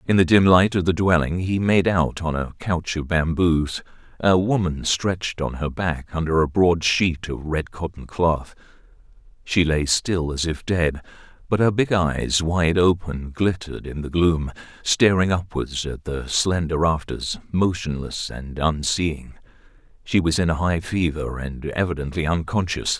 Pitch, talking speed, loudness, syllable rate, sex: 85 Hz, 165 wpm, -22 LUFS, 4.3 syllables/s, male